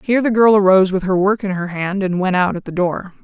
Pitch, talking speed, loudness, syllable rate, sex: 190 Hz, 295 wpm, -16 LUFS, 6.2 syllables/s, female